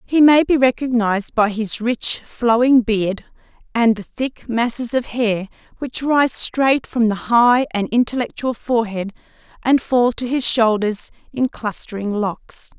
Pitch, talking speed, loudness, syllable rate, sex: 235 Hz, 150 wpm, -18 LUFS, 4.1 syllables/s, female